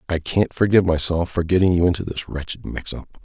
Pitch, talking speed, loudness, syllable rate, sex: 85 Hz, 220 wpm, -21 LUFS, 6.1 syllables/s, male